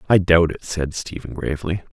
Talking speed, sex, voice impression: 185 wpm, male, very masculine, very adult-like, middle-aged, very thick, slightly relaxed, slightly weak, slightly dark, slightly soft, muffled, fluent, very cool, intellectual, sincere, calm, very mature, very friendly, very reassuring, slightly unique, slightly elegant, slightly strict, slightly sharp